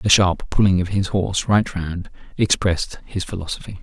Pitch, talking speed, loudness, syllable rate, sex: 95 Hz, 175 wpm, -20 LUFS, 5.3 syllables/s, male